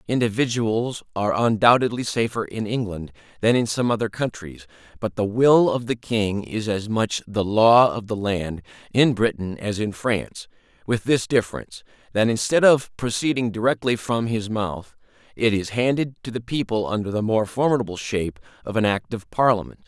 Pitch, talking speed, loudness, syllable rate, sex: 110 Hz, 170 wpm, -22 LUFS, 5.0 syllables/s, male